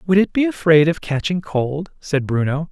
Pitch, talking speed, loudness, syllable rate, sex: 160 Hz, 200 wpm, -18 LUFS, 4.8 syllables/s, male